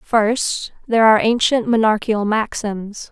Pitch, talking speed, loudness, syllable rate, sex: 220 Hz, 115 wpm, -17 LUFS, 4.4 syllables/s, female